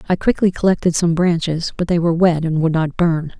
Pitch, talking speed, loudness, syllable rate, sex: 170 Hz, 230 wpm, -17 LUFS, 5.7 syllables/s, female